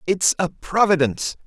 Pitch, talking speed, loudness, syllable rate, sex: 170 Hz, 125 wpm, -20 LUFS, 4.9 syllables/s, male